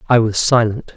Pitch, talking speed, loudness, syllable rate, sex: 115 Hz, 190 wpm, -15 LUFS, 5.2 syllables/s, male